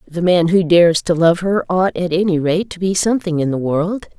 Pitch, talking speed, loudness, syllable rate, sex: 175 Hz, 245 wpm, -16 LUFS, 5.4 syllables/s, female